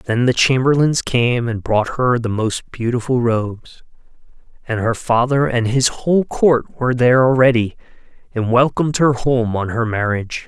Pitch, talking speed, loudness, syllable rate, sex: 120 Hz, 160 wpm, -17 LUFS, 4.7 syllables/s, male